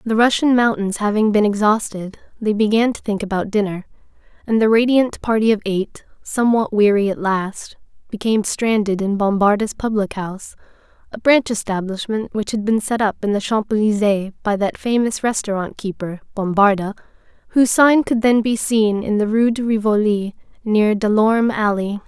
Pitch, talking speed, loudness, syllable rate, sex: 215 Hz, 165 wpm, -18 LUFS, 5.1 syllables/s, female